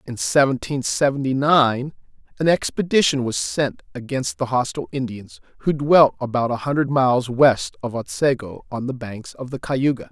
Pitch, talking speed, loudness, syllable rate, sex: 130 Hz, 160 wpm, -20 LUFS, 4.9 syllables/s, male